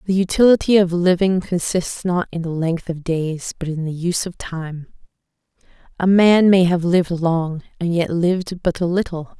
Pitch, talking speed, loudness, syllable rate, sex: 175 Hz, 185 wpm, -18 LUFS, 4.8 syllables/s, female